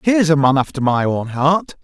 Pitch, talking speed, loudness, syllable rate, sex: 150 Hz, 230 wpm, -16 LUFS, 5.3 syllables/s, male